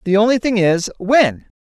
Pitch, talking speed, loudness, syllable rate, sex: 210 Hz, 185 wpm, -15 LUFS, 4.6 syllables/s, female